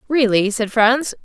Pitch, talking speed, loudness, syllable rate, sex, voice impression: 235 Hz, 145 wpm, -16 LUFS, 3.9 syllables/s, female, very feminine, slightly adult-like, thin, slightly tensed, weak, slightly dark, soft, clear, fluent, cute, intellectual, refreshing, slightly sincere, calm, friendly, reassuring, unique, slightly elegant, slightly wild, sweet, lively, strict, slightly intense, slightly sharp, slightly light